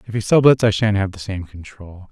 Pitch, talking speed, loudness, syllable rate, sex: 100 Hz, 255 wpm, -17 LUFS, 5.6 syllables/s, male